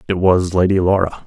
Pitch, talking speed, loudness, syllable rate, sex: 95 Hz, 190 wpm, -16 LUFS, 5.6 syllables/s, male